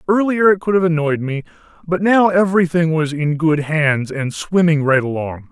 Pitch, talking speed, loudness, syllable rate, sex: 165 Hz, 185 wpm, -16 LUFS, 4.9 syllables/s, male